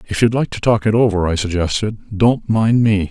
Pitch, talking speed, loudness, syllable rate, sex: 105 Hz, 230 wpm, -16 LUFS, 5.2 syllables/s, male